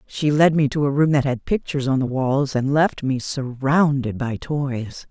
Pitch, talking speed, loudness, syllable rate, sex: 140 Hz, 210 wpm, -20 LUFS, 4.4 syllables/s, female